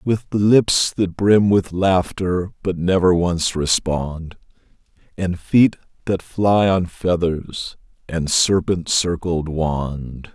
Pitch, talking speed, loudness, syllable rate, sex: 90 Hz, 115 wpm, -19 LUFS, 3.0 syllables/s, male